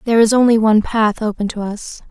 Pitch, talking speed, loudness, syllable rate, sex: 220 Hz, 230 wpm, -15 LUFS, 6.3 syllables/s, female